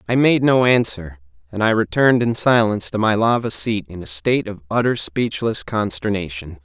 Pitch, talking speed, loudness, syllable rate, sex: 105 Hz, 180 wpm, -18 LUFS, 5.3 syllables/s, male